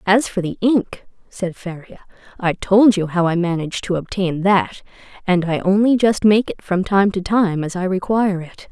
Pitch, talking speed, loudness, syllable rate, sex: 190 Hz, 195 wpm, -18 LUFS, 4.8 syllables/s, female